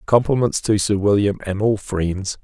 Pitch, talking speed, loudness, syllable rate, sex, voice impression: 105 Hz, 175 wpm, -19 LUFS, 4.5 syllables/s, male, very masculine, very adult-like, very middle-aged, very thick, slightly relaxed, powerful, dark, slightly soft, slightly muffled, fluent, slightly raspy, cool, intellectual, sincere, very calm, friendly, very reassuring, unique, slightly elegant, wild, slightly sweet, slightly lively, slightly kind, modest